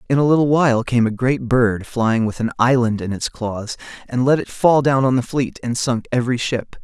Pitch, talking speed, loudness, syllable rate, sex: 125 Hz, 235 wpm, -18 LUFS, 5.2 syllables/s, male